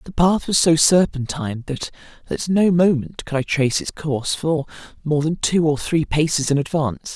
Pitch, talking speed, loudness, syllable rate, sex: 155 Hz, 195 wpm, -19 LUFS, 5.1 syllables/s, female